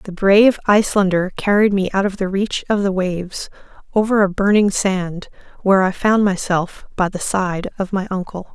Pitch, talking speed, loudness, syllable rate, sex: 195 Hz, 185 wpm, -17 LUFS, 5.1 syllables/s, female